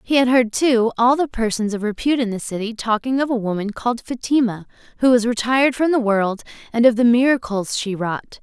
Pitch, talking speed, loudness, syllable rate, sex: 235 Hz, 215 wpm, -19 LUFS, 5.7 syllables/s, female